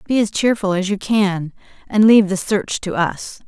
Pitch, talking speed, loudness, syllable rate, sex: 200 Hz, 205 wpm, -17 LUFS, 4.7 syllables/s, female